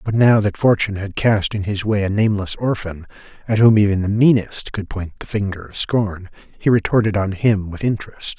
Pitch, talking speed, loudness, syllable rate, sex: 105 Hz, 205 wpm, -18 LUFS, 5.5 syllables/s, male